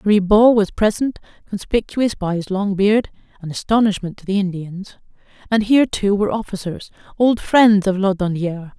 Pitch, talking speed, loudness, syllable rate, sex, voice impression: 200 Hz, 150 wpm, -18 LUFS, 5.1 syllables/s, female, feminine, middle-aged, tensed, powerful, clear, fluent, intellectual, friendly, elegant, lively, slightly kind